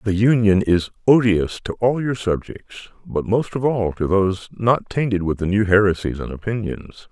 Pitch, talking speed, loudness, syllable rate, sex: 105 Hz, 185 wpm, -19 LUFS, 4.7 syllables/s, male